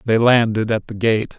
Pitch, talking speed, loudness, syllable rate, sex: 110 Hz, 215 wpm, -17 LUFS, 4.7 syllables/s, male